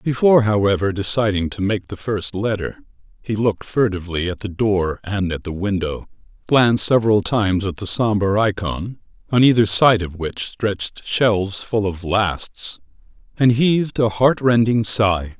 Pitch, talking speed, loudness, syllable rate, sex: 105 Hz, 160 wpm, -19 LUFS, 4.7 syllables/s, male